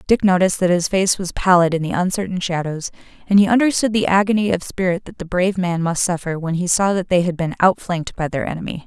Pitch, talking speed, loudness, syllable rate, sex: 180 Hz, 235 wpm, -18 LUFS, 6.2 syllables/s, female